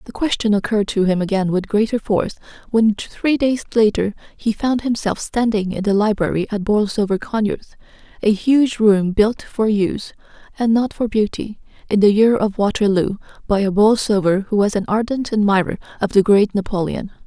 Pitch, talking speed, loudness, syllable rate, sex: 210 Hz, 175 wpm, -18 LUFS, 5.2 syllables/s, female